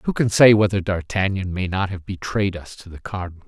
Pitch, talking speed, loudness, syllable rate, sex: 95 Hz, 225 wpm, -20 LUFS, 5.6 syllables/s, male